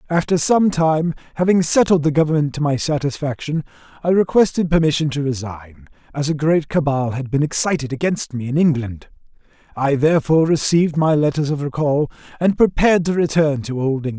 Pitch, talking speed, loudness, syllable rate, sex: 150 Hz, 170 wpm, -18 LUFS, 5.7 syllables/s, male